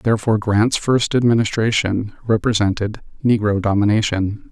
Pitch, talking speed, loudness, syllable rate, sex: 110 Hz, 95 wpm, -18 LUFS, 5.1 syllables/s, male